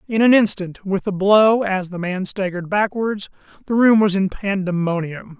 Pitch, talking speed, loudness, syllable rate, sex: 195 Hz, 180 wpm, -18 LUFS, 4.8 syllables/s, male